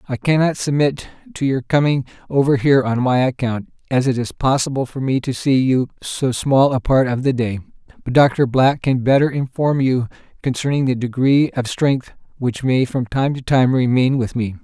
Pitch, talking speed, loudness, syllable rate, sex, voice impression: 130 Hz, 195 wpm, -18 LUFS, 4.9 syllables/s, male, masculine, adult-like, slightly refreshing, sincere, friendly